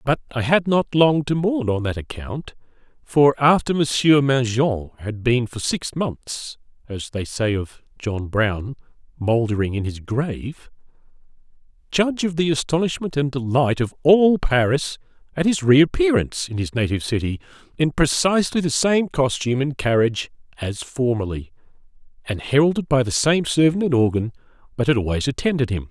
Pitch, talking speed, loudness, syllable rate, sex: 130 Hz, 150 wpm, -20 LUFS, 4.9 syllables/s, male